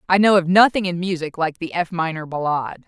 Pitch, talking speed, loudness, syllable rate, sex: 175 Hz, 230 wpm, -19 LUFS, 5.9 syllables/s, female